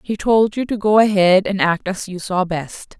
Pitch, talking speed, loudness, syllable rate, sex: 195 Hz, 240 wpm, -17 LUFS, 4.5 syllables/s, female